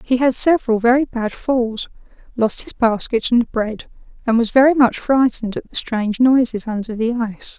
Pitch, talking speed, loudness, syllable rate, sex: 240 Hz, 180 wpm, -17 LUFS, 5.1 syllables/s, female